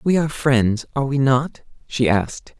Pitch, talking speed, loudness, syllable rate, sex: 130 Hz, 185 wpm, -19 LUFS, 4.9 syllables/s, male